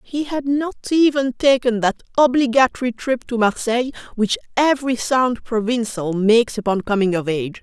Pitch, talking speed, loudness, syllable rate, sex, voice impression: 240 Hz, 150 wpm, -19 LUFS, 5.2 syllables/s, female, feminine, adult-like, slightly clear, slightly intellectual, slightly calm, slightly strict